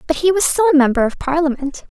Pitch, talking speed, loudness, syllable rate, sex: 305 Hz, 245 wpm, -16 LUFS, 6.7 syllables/s, female